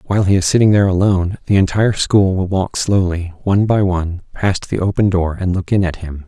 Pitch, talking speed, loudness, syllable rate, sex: 95 Hz, 230 wpm, -16 LUFS, 6.0 syllables/s, male